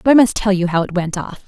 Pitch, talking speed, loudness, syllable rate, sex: 195 Hz, 365 wpm, -17 LUFS, 6.6 syllables/s, female